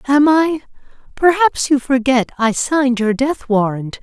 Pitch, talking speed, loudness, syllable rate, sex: 265 Hz, 150 wpm, -15 LUFS, 4.3 syllables/s, female